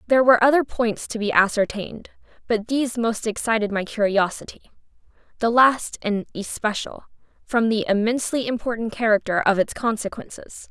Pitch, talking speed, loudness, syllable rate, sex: 225 Hz, 135 wpm, -21 LUFS, 5.5 syllables/s, female